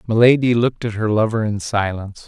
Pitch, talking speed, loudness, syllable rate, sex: 110 Hz, 185 wpm, -18 LUFS, 6.2 syllables/s, male